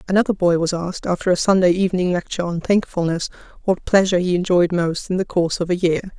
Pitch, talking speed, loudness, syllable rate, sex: 180 Hz, 215 wpm, -19 LUFS, 6.7 syllables/s, female